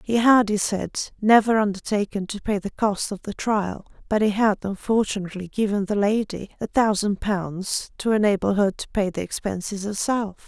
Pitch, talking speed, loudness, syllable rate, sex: 205 Hz, 180 wpm, -23 LUFS, 5.0 syllables/s, female